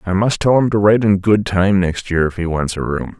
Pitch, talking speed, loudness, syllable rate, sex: 95 Hz, 300 wpm, -16 LUFS, 5.5 syllables/s, male